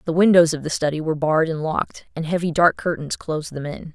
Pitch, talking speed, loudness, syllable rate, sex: 160 Hz, 245 wpm, -21 LUFS, 6.4 syllables/s, female